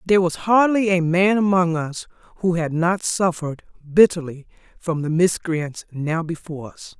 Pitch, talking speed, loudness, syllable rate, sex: 170 Hz, 155 wpm, -20 LUFS, 4.7 syllables/s, female